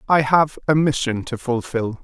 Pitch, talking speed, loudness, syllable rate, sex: 130 Hz, 175 wpm, -20 LUFS, 4.5 syllables/s, male